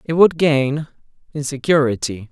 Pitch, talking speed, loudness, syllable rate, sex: 145 Hz, 130 wpm, -18 LUFS, 4.5 syllables/s, male